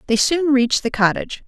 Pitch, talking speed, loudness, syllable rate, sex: 260 Hz, 205 wpm, -18 LUFS, 6.2 syllables/s, female